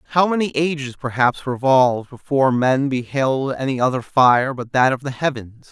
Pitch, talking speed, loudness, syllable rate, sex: 130 Hz, 170 wpm, -19 LUFS, 5.1 syllables/s, male